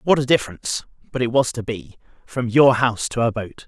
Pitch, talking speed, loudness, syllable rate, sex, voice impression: 120 Hz, 195 wpm, -20 LUFS, 5.9 syllables/s, male, very masculine, very adult-like, old, very thick, tensed, slightly powerful, bright, hard, muffled, fluent, slightly raspy, slightly cool, slightly intellectual, refreshing, sincere, calm, mature, slightly friendly, slightly reassuring, unique, slightly elegant, slightly wild, slightly sweet, slightly lively, kind, slightly modest